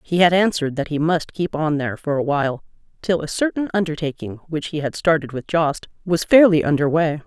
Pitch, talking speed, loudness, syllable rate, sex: 160 Hz, 205 wpm, -20 LUFS, 5.7 syllables/s, female